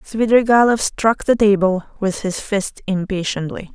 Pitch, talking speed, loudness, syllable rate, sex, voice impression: 205 Hz, 130 wpm, -17 LUFS, 4.4 syllables/s, female, feminine, adult-like, tensed, slightly powerful, slightly dark, soft, clear, intellectual, slightly friendly, elegant, lively, slightly strict, slightly sharp